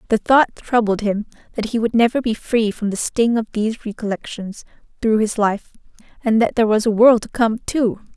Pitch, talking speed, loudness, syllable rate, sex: 220 Hz, 205 wpm, -18 LUFS, 5.2 syllables/s, female